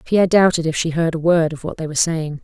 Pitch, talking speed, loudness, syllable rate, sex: 165 Hz, 295 wpm, -18 LUFS, 6.4 syllables/s, female